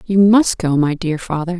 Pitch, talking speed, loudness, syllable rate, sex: 175 Hz, 225 wpm, -15 LUFS, 4.8 syllables/s, female